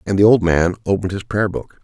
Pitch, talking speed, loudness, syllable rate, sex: 100 Hz, 260 wpm, -17 LUFS, 6.4 syllables/s, male